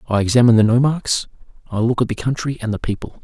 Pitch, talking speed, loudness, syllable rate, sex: 115 Hz, 225 wpm, -18 LUFS, 6.6 syllables/s, male